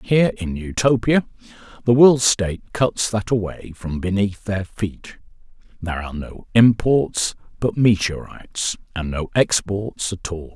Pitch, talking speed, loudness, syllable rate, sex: 105 Hz, 135 wpm, -20 LUFS, 4.3 syllables/s, male